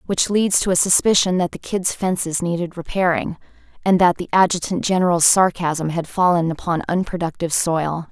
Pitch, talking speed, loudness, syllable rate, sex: 175 Hz, 165 wpm, -18 LUFS, 5.3 syllables/s, female